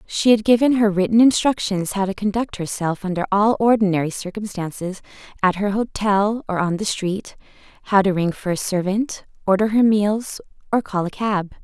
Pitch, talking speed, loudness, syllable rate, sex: 200 Hz, 170 wpm, -20 LUFS, 5.1 syllables/s, female